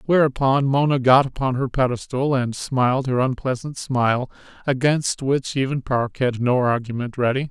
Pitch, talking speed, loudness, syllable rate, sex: 130 Hz, 150 wpm, -21 LUFS, 4.9 syllables/s, male